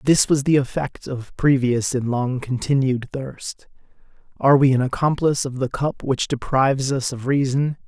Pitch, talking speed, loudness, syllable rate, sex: 135 Hz, 170 wpm, -20 LUFS, 4.8 syllables/s, male